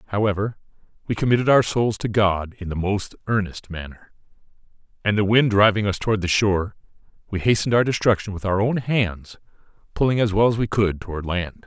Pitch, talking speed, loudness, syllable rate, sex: 100 Hz, 185 wpm, -21 LUFS, 5.8 syllables/s, male